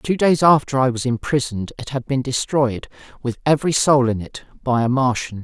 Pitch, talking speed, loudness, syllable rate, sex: 130 Hz, 200 wpm, -19 LUFS, 5.5 syllables/s, male